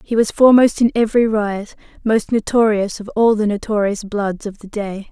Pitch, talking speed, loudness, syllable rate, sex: 215 Hz, 190 wpm, -17 LUFS, 5.2 syllables/s, female